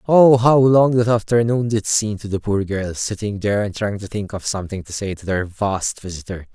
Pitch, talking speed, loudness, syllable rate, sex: 105 Hz, 230 wpm, -19 LUFS, 5.2 syllables/s, male